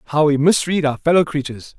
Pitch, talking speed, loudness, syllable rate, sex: 150 Hz, 200 wpm, -17 LUFS, 6.5 syllables/s, male